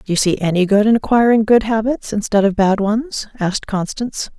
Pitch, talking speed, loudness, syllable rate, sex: 215 Hz, 205 wpm, -16 LUFS, 5.5 syllables/s, female